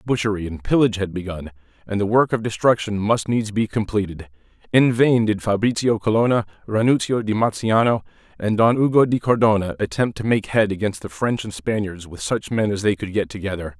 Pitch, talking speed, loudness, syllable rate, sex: 105 Hz, 190 wpm, -20 LUFS, 5.6 syllables/s, male